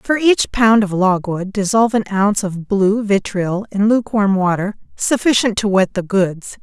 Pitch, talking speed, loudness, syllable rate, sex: 205 Hz, 170 wpm, -16 LUFS, 4.7 syllables/s, female